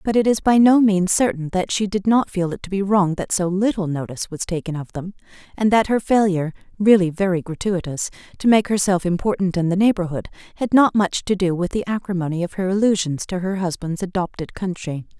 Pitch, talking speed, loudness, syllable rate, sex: 190 Hz, 215 wpm, -20 LUFS, 5.5 syllables/s, female